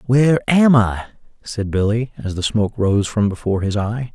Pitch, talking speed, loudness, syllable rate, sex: 110 Hz, 190 wpm, -18 LUFS, 5.3 syllables/s, male